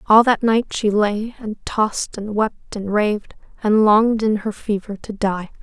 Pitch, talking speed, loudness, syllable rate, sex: 215 Hz, 190 wpm, -19 LUFS, 4.3 syllables/s, female